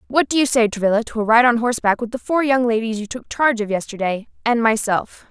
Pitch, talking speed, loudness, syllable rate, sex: 230 Hz, 250 wpm, -19 LUFS, 6.3 syllables/s, female